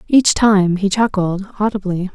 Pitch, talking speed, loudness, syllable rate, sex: 200 Hz, 140 wpm, -16 LUFS, 4.2 syllables/s, female